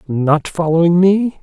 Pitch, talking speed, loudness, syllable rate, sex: 170 Hz, 125 wpm, -14 LUFS, 4.0 syllables/s, male